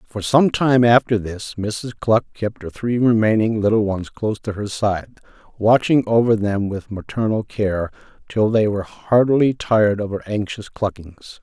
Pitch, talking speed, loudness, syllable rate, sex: 110 Hz, 170 wpm, -19 LUFS, 4.6 syllables/s, male